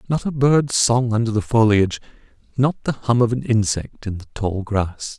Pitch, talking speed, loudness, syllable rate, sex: 115 Hz, 195 wpm, -19 LUFS, 4.8 syllables/s, male